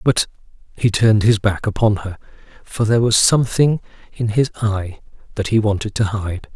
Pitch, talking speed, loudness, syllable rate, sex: 110 Hz, 175 wpm, -18 LUFS, 5.3 syllables/s, male